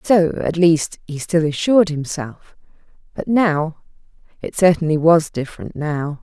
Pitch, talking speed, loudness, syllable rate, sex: 160 Hz, 125 wpm, -18 LUFS, 4.3 syllables/s, female